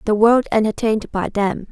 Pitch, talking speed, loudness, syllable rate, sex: 215 Hz, 175 wpm, -18 LUFS, 5.4 syllables/s, female